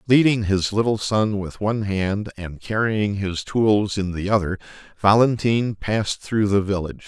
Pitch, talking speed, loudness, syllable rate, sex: 105 Hz, 160 wpm, -21 LUFS, 4.7 syllables/s, male